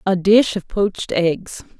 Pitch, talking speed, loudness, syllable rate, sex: 190 Hz, 170 wpm, -18 LUFS, 3.9 syllables/s, female